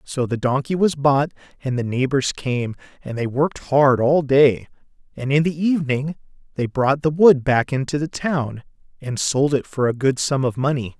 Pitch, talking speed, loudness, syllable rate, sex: 135 Hz, 195 wpm, -20 LUFS, 4.7 syllables/s, male